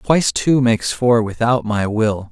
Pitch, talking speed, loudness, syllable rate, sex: 115 Hz, 180 wpm, -17 LUFS, 4.4 syllables/s, male